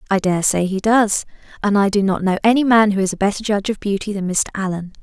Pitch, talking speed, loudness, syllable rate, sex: 200 Hz, 265 wpm, -18 LUFS, 6.3 syllables/s, female